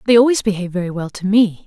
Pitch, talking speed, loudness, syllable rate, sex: 200 Hz, 250 wpm, -17 LUFS, 7.3 syllables/s, female